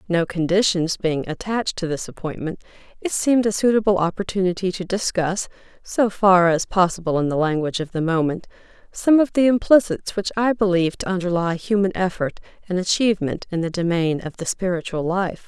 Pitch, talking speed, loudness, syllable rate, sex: 185 Hz, 170 wpm, -21 LUFS, 5.6 syllables/s, female